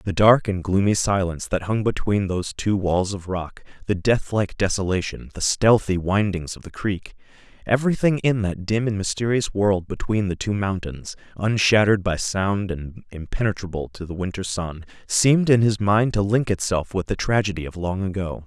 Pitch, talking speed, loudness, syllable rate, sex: 100 Hz, 180 wpm, -22 LUFS, 5.0 syllables/s, male